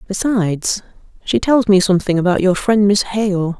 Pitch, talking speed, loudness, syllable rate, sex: 195 Hz, 165 wpm, -15 LUFS, 5.0 syllables/s, female